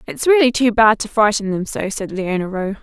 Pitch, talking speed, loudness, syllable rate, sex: 215 Hz, 235 wpm, -17 LUFS, 5.7 syllables/s, female